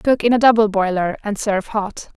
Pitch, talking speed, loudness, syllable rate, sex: 210 Hz, 220 wpm, -17 LUFS, 5.4 syllables/s, female